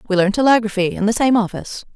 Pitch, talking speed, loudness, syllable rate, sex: 215 Hz, 215 wpm, -17 LUFS, 7.7 syllables/s, female